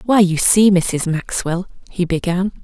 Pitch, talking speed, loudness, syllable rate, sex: 185 Hz, 160 wpm, -16 LUFS, 4.0 syllables/s, female